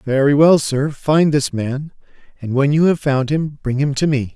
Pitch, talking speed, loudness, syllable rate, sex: 140 Hz, 220 wpm, -17 LUFS, 4.5 syllables/s, male